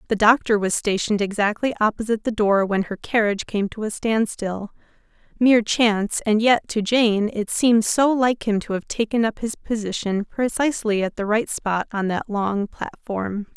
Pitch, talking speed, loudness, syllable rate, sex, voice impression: 215 Hz, 180 wpm, -21 LUFS, 5.0 syllables/s, female, very feminine, adult-like, thin, tensed, slightly powerful, bright, slightly soft, clear, very fluent, slightly raspy, cool, intellectual, very refreshing, sincere, calm, friendly, reassuring, unique, slightly elegant, wild, very sweet, lively, kind, slightly modest, light